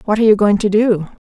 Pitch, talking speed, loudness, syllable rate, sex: 210 Hz, 280 wpm, -14 LUFS, 7.2 syllables/s, female